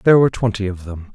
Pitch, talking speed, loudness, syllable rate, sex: 105 Hz, 260 wpm, -18 LUFS, 7.2 syllables/s, male